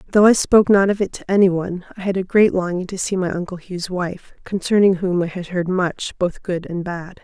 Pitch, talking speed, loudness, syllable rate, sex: 185 Hz, 240 wpm, -19 LUFS, 5.4 syllables/s, female